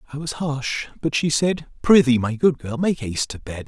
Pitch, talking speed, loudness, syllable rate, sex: 140 Hz, 230 wpm, -21 LUFS, 5.1 syllables/s, male